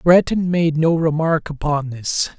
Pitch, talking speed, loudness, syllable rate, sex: 160 Hz, 150 wpm, -18 LUFS, 3.9 syllables/s, male